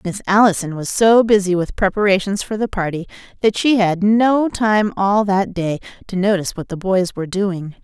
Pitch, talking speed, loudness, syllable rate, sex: 195 Hz, 190 wpm, -17 LUFS, 5.0 syllables/s, female